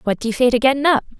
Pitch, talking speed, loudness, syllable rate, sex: 250 Hz, 350 wpm, -17 LUFS, 8.5 syllables/s, female